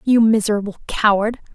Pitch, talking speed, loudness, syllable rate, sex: 215 Hz, 115 wpm, -18 LUFS, 5.4 syllables/s, female